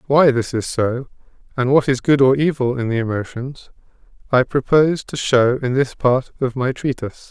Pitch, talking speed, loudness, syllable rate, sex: 130 Hz, 190 wpm, -18 LUFS, 5.0 syllables/s, male